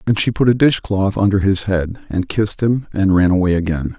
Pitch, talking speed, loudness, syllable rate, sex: 100 Hz, 240 wpm, -16 LUFS, 5.4 syllables/s, male